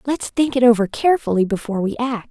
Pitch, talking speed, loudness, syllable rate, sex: 235 Hz, 210 wpm, -18 LUFS, 6.5 syllables/s, female